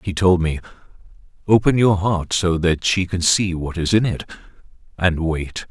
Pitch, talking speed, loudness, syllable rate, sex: 90 Hz, 170 wpm, -19 LUFS, 4.5 syllables/s, male